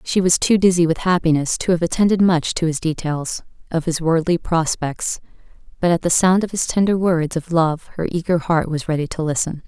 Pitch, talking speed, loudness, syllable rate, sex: 170 Hz, 210 wpm, -19 LUFS, 5.4 syllables/s, female